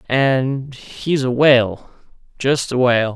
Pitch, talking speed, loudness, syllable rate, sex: 130 Hz, 135 wpm, -17 LUFS, 3.6 syllables/s, male